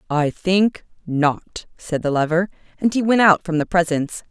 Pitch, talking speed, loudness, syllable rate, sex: 170 Hz, 165 wpm, -19 LUFS, 4.6 syllables/s, female